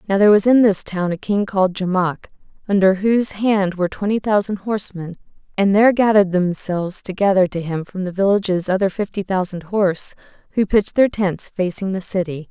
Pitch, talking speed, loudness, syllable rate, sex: 195 Hz, 180 wpm, -18 LUFS, 5.8 syllables/s, female